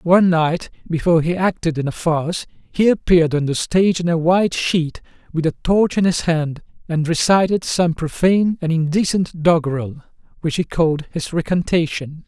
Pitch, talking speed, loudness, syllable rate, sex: 165 Hz, 170 wpm, -18 LUFS, 5.2 syllables/s, male